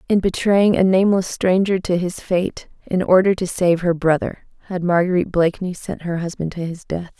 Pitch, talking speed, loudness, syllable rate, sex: 180 Hz, 190 wpm, -19 LUFS, 5.3 syllables/s, female